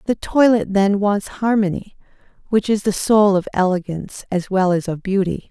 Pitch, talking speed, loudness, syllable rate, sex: 200 Hz, 175 wpm, -18 LUFS, 4.9 syllables/s, female